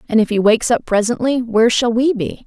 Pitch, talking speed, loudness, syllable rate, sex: 230 Hz, 245 wpm, -16 LUFS, 6.1 syllables/s, female